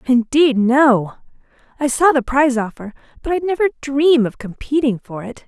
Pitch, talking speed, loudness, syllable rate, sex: 265 Hz, 165 wpm, -16 LUFS, 4.9 syllables/s, female